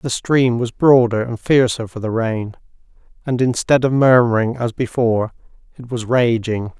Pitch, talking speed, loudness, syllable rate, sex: 120 Hz, 160 wpm, -17 LUFS, 4.7 syllables/s, male